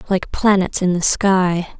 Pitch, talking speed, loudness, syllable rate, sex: 185 Hz, 165 wpm, -16 LUFS, 3.9 syllables/s, female